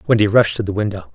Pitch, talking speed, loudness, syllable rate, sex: 105 Hz, 265 wpm, -17 LUFS, 7.8 syllables/s, male